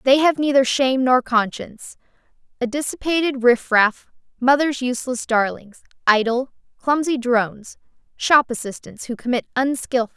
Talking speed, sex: 130 wpm, female